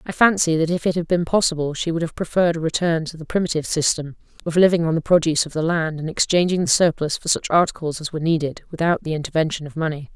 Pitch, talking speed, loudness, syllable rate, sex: 165 Hz, 240 wpm, -20 LUFS, 6.9 syllables/s, female